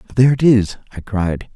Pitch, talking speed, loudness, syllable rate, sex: 110 Hz, 195 wpm, -16 LUFS, 6.1 syllables/s, male